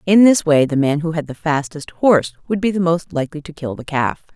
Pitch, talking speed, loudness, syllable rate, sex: 160 Hz, 260 wpm, -17 LUFS, 5.8 syllables/s, female